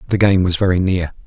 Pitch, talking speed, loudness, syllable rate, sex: 95 Hz, 235 wpm, -16 LUFS, 6.3 syllables/s, male